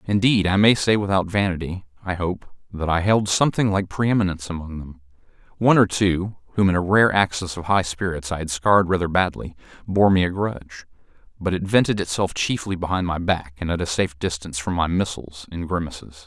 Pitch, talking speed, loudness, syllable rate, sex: 90 Hz, 195 wpm, -21 LUFS, 5.9 syllables/s, male